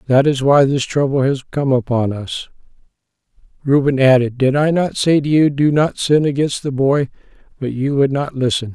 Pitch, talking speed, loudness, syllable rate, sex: 135 Hz, 190 wpm, -16 LUFS, 5.0 syllables/s, male